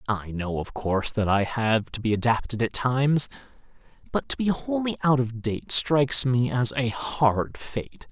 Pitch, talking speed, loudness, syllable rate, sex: 120 Hz, 185 wpm, -24 LUFS, 4.4 syllables/s, male